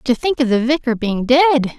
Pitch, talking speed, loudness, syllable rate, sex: 250 Hz, 235 wpm, -16 LUFS, 5.7 syllables/s, female